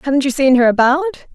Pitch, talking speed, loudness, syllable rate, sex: 275 Hz, 225 wpm, -14 LUFS, 7.7 syllables/s, female